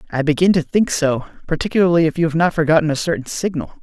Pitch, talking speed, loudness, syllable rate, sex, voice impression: 160 Hz, 220 wpm, -17 LUFS, 6.8 syllables/s, male, masculine, adult-like, tensed, powerful, slightly bright, clear, fluent, intellectual, sincere, friendly, unique, wild, lively, slightly kind